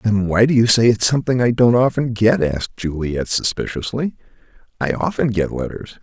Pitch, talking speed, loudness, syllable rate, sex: 115 Hz, 180 wpm, -18 LUFS, 5.3 syllables/s, male